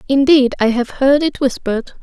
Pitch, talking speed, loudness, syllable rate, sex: 265 Hz, 180 wpm, -15 LUFS, 5.2 syllables/s, female